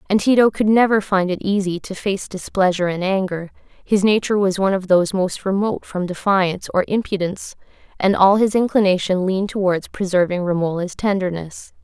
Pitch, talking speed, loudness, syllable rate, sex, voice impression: 190 Hz, 165 wpm, -19 LUFS, 5.7 syllables/s, female, feminine, adult-like, tensed, bright, clear, fluent, intellectual, calm, friendly, reassuring, elegant, lively, slightly strict